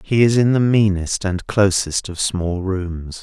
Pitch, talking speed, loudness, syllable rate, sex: 100 Hz, 185 wpm, -18 LUFS, 3.8 syllables/s, male